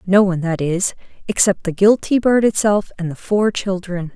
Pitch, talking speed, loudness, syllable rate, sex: 190 Hz, 190 wpm, -17 LUFS, 4.9 syllables/s, female